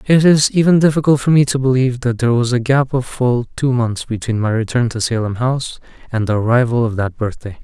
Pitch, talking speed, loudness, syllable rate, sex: 125 Hz, 230 wpm, -16 LUFS, 5.9 syllables/s, male